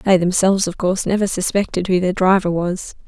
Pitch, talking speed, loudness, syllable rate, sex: 185 Hz, 195 wpm, -18 LUFS, 5.8 syllables/s, female